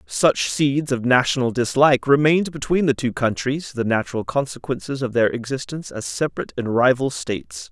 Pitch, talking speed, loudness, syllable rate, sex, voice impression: 130 Hz, 165 wpm, -20 LUFS, 5.6 syllables/s, male, masculine, adult-like, slightly fluent, slightly refreshing, sincere, friendly, slightly kind